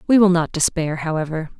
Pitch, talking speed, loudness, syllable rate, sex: 170 Hz, 190 wpm, -19 LUFS, 5.8 syllables/s, female